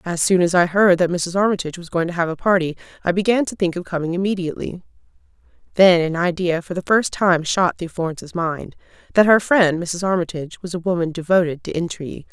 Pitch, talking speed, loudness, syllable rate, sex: 175 Hz, 205 wpm, -19 LUFS, 6.1 syllables/s, female